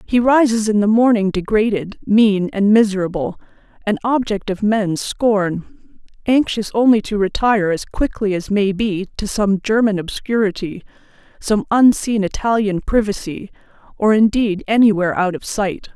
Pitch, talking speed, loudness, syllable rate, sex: 210 Hz, 140 wpm, -17 LUFS, 4.6 syllables/s, female